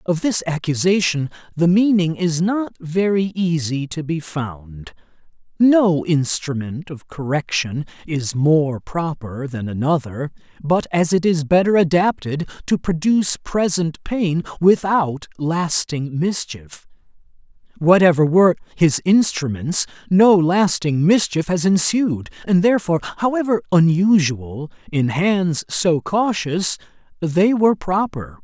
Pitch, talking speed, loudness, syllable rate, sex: 170 Hz, 115 wpm, -18 LUFS, 4.0 syllables/s, male